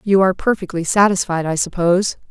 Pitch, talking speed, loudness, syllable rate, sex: 185 Hz, 155 wpm, -17 LUFS, 6.2 syllables/s, female